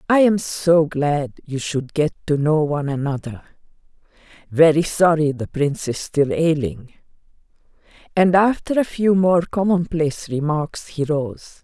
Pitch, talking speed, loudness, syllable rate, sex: 160 Hz, 140 wpm, -19 LUFS, 4.3 syllables/s, female